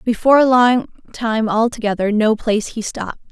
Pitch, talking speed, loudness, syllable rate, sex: 225 Hz, 145 wpm, -16 LUFS, 4.9 syllables/s, female